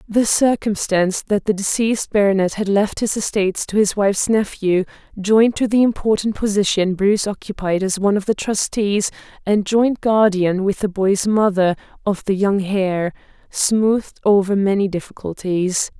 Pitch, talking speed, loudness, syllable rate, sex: 200 Hz, 155 wpm, -18 LUFS, 4.9 syllables/s, female